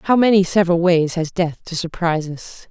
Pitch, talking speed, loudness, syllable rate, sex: 175 Hz, 200 wpm, -18 LUFS, 5.3 syllables/s, female